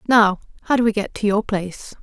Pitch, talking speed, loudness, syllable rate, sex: 210 Hz, 235 wpm, -19 LUFS, 5.9 syllables/s, female